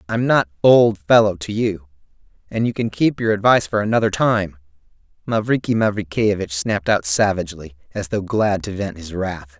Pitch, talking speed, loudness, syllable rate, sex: 100 Hz, 170 wpm, -19 LUFS, 5.2 syllables/s, male